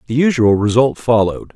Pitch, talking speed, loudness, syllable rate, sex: 120 Hz, 155 wpm, -14 LUFS, 5.9 syllables/s, male